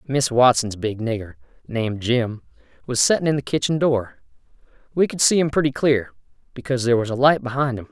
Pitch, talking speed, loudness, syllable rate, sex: 130 Hz, 190 wpm, -20 LUFS, 5.9 syllables/s, male